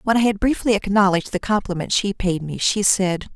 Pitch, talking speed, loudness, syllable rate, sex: 200 Hz, 215 wpm, -20 LUFS, 5.7 syllables/s, female